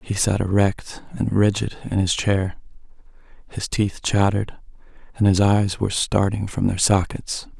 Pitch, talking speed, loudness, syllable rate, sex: 100 Hz, 140 wpm, -21 LUFS, 4.5 syllables/s, male